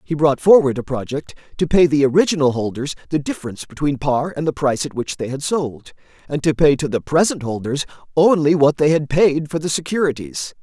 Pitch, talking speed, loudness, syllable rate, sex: 150 Hz, 210 wpm, -18 LUFS, 5.7 syllables/s, male